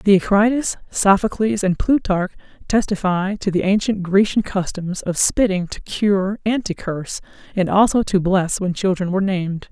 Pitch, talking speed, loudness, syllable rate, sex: 195 Hz, 155 wpm, -19 LUFS, 4.7 syllables/s, female